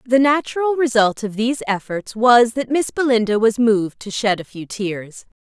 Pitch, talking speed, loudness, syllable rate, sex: 230 Hz, 190 wpm, -18 LUFS, 4.9 syllables/s, female